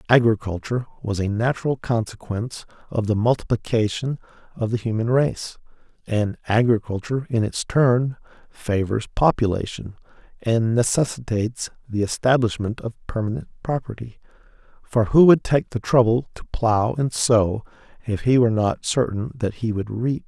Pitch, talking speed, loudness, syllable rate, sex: 115 Hz, 135 wpm, -22 LUFS, 5.0 syllables/s, male